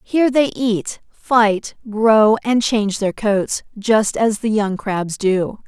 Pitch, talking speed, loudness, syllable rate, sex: 215 Hz, 160 wpm, -17 LUFS, 3.3 syllables/s, female